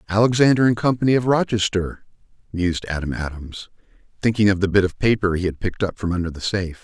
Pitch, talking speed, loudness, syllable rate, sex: 100 Hz, 195 wpm, -20 LUFS, 6.5 syllables/s, male